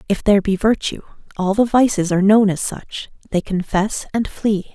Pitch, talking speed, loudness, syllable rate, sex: 200 Hz, 190 wpm, -18 LUFS, 5.1 syllables/s, female